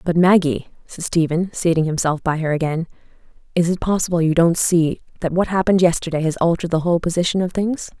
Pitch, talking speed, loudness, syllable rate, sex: 170 Hz, 195 wpm, -19 LUFS, 6.2 syllables/s, female